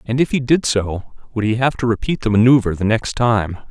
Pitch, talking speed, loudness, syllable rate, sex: 115 Hz, 245 wpm, -17 LUFS, 5.3 syllables/s, male